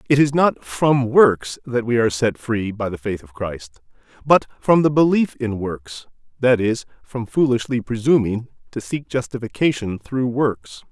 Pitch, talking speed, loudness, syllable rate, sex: 120 Hz, 170 wpm, -20 LUFS, 4.4 syllables/s, male